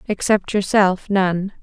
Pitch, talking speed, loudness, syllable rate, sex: 195 Hz, 110 wpm, -18 LUFS, 3.6 syllables/s, female